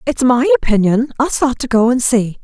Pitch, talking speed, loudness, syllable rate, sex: 235 Hz, 220 wpm, -14 LUFS, 5.4 syllables/s, female